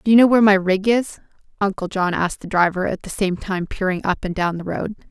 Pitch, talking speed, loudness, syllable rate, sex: 195 Hz, 260 wpm, -19 LUFS, 5.9 syllables/s, female